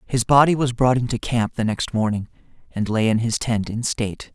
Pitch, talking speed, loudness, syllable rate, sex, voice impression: 115 Hz, 220 wpm, -21 LUFS, 5.3 syllables/s, male, masculine, adult-like, slightly fluent, refreshing, slightly sincere, friendly